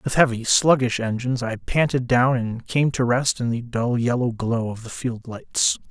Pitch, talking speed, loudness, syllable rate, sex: 120 Hz, 205 wpm, -22 LUFS, 4.6 syllables/s, male